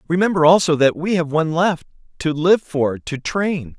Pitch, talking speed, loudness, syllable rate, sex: 160 Hz, 190 wpm, -18 LUFS, 4.8 syllables/s, male